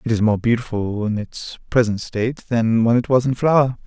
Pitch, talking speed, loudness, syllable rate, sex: 115 Hz, 215 wpm, -19 LUFS, 5.3 syllables/s, male